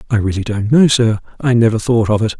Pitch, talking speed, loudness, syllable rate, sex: 115 Hz, 250 wpm, -14 LUFS, 6.1 syllables/s, male